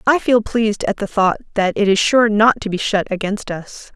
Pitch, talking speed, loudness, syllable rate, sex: 210 Hz, 245 wpm, -17 LUFS, 5.0 syllables/s, female